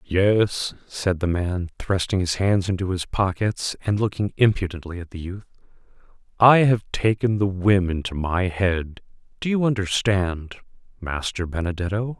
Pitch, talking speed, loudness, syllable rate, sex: 95 Hz, 145 wpm, -22 LUFS, 4.4 syllables/s, male